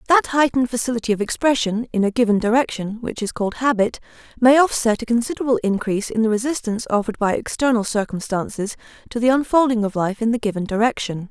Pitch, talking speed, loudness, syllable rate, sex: 230 Hz, 180 wpm, -20 LUFS, 6.6 syllables/s, female